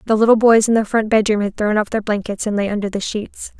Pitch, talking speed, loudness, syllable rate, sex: 210 Hz, 285 wpm, -17 LUFS, 6.2 syllables/s, female